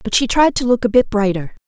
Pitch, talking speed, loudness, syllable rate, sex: 225 Hz, 285 wpm, -16 LUFS, 6.0 syllables/s, female